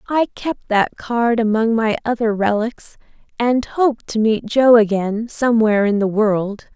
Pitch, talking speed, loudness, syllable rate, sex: 225 Hz, 160 wpm, -17 LUFS, 4.3 syllables/s, female